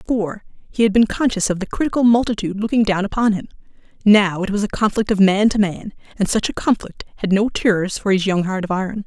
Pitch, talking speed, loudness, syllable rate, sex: 205 Hz, 230 wpm, -18 LUFS, 6.3 syllables/s, female